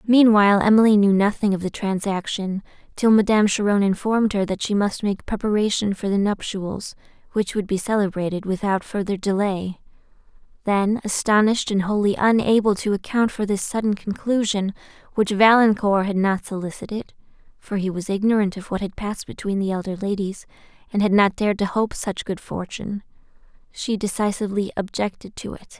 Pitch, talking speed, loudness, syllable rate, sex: 205 Hz, 160 wpm, -21 LUFS, 4.9 syllables/s, female